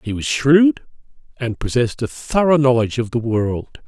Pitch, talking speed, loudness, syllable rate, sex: 125 Hz, 170 wpm, -18 LUFS, 4.9 syllables/s, male